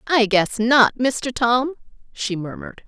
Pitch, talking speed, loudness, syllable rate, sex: 240 Hz, 145 wpm, -19 LUFS, 3.8 syllables/s, female